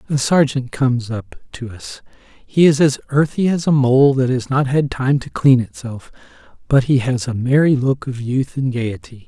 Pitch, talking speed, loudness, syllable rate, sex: 130 Hz, 200 wpm, -17 LUFS, 4.6 syllables/s, male